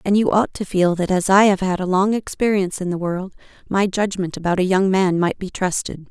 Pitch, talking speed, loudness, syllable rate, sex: 190 Hz, 245 wpm, -19 LUFS, 5.5 syllables/s, female